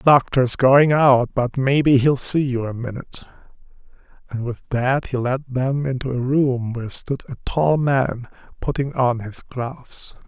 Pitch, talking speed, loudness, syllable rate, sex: 130 Hz, 170 wpm, -20 LUFS, 4.4 syllables/s, male